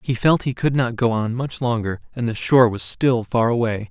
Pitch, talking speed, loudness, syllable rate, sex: 120 Hz, 245 wpm, -20 LUFS, 5.2 syllables/s, male